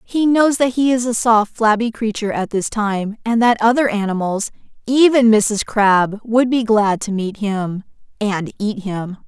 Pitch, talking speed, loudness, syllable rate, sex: 220 Hz, 175 wpm, -17 LUFS, 4.3 syllables/s, female